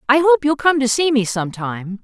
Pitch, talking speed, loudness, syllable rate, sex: 255 Hz, 235 wpm, -17 LUFS, 5.9 syllables/s, female